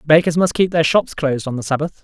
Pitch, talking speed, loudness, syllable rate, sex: 155 Hz, 265 wpm, -17 LUFS, 6.3 syllables/s, male